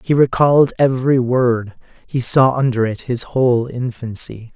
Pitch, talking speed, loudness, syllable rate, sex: 125 Hz, 145 wpm, -16 LUFS, 4.7 syllables/s, male